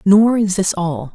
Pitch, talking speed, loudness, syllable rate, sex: 190 Hz, 210 wpm, -16 LUFS, 3.8 syllables/s, female